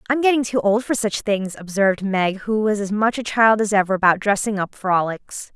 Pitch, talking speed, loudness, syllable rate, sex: 205 Hz, 225 wpm, -19 LUFS, 5.3 syllables/s, female